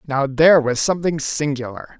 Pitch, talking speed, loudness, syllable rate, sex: 140 Hz, 150 wpm, -18 LUFS, 5.4 syllables/s, male